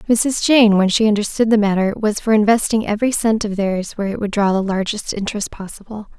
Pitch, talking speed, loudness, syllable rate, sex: 210 Hz, 215 wpm, -17 LUFS, 5.9 syllables/s, female